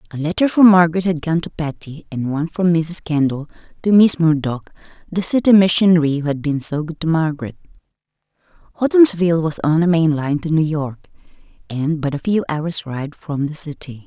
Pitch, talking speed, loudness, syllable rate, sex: 160 Hz, 190 wpm, -17 LUFS, 5.5 syllables/s, female